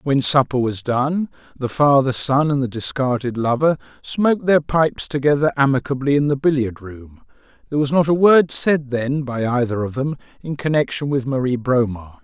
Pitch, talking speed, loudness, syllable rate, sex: 135 Hz, 175 wpm, -19 LUFS, 5.1 syllables/s, male